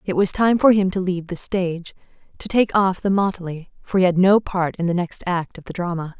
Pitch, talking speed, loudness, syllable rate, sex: 185 Hz, 250 wpm, -20 LUFS, 5.4 syllables/s, female